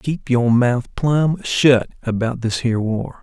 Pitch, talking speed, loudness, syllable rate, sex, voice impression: 125 Hz, 170 wpm, -18 LUFS, 3.6 syllables/s, male, very masculine, very adult-like, middle-aged, very thick, slightly relaxed, slightly weak, slightly dark, soft, slightly muffled, fluent, cool, very intellectual, refreshing, sincere, calm, slightly mature, slightly reassuring, very unique, slightly elegant, wild, sweet, kind, modest